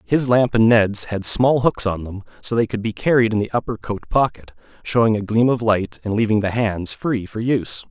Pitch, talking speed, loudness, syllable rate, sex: 110 Hz, 235 wpm, -19 LUFS, 5.1 syllables/s, male